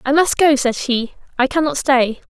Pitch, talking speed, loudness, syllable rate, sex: 275 Hz, 210 wpm, -16 LUFS, 4.7 syllables/s, female